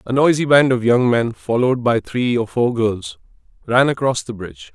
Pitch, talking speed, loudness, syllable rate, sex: 125 Hz, 200 wpm, -17 LUFS, 5.0 syllables/s, male